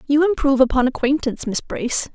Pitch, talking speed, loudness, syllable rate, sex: 275 Hz, 170 wpm, -19 LUFS, 6.7 syllables/s, female